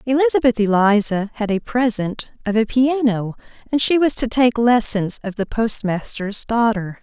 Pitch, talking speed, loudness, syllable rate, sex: 225 Hz, 155 wpm, -18 LUFS, 4.6 syllables/s, female